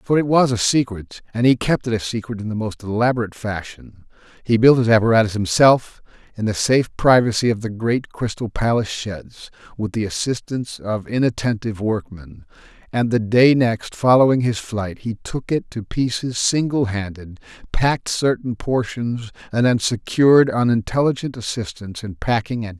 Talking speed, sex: 170 wpm, male